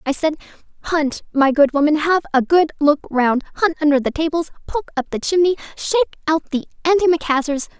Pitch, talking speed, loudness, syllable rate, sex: 310 Hz, 175 wpm, -18 LUFS, 6.0 syllables/s, female